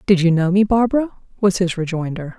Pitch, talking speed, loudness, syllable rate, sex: 190 Hz, 200 wpm, -18 LUFS, 5.9 syllables/s, female